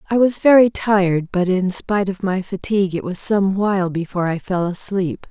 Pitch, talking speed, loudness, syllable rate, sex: 190 Hz, 205 wpm, -18 LUFS, 5.3 syllables/s, female